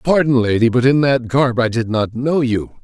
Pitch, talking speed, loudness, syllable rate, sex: 125 Hz, 230 wpm, -16 LUFS, 4.9 syllables/s, male